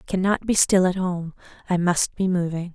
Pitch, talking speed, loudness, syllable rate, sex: 180 Hz, 220 wpm, -22 LUFS, 5.4 syllables/s, female